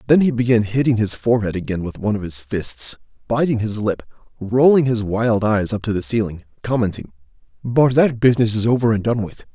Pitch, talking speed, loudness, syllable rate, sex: 110 Hz, 200 wpm, -18 LUFS, 5.7 syllables/s, male